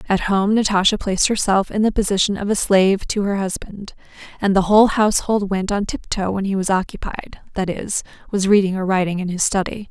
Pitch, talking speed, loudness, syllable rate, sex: 195 Hz, 200 wpm, -19 LUFS, 5.7 syllables/s, female